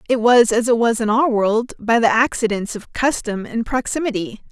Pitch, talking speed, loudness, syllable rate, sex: 230 Hz, 200 wpm, -18 LUFS, 5.0 syllables/s, female